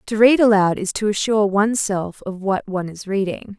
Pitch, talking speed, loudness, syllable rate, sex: 200 Hz, 220 wpm, -19 LUFS, 5.5 syllables/s, female